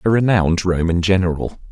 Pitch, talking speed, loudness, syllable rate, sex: 90 Hz, 140 wpm, -17 LUFS, 6.0 syllables/s, male